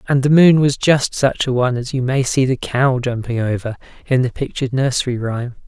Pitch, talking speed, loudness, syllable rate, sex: 130 Hz, 220 wpm, -17 LUFS, 5.6 syllables/s, male